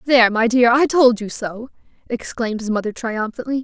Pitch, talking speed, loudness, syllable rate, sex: 235 Hz, 180 wpm, -18 LUFS, 5.5 syllables/s, female